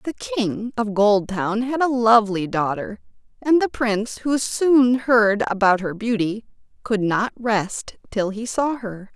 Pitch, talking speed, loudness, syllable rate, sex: 225 Hz, 155 wpm, -20 LUFS, 4.0 syllables/s, female